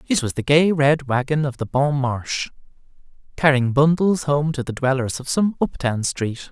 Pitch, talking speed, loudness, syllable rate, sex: 140 Hz, 195 wpm, -20 LUFS, 4.8 syllables/s, male